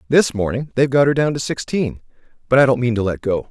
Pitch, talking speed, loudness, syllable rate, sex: 125 Hz, 255 wpm, -18 LUFS, 6.4 syllables/s, male